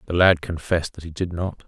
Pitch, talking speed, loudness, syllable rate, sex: 85 Hz, 250 wpm, -23 LUFS, 6.0 syllables/s, male